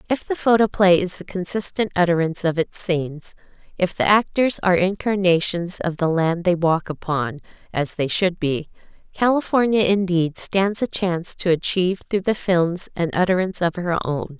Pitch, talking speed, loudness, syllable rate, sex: 180 Hz, 165 wpm, -20 LUFS, 5.0 syllables/s, female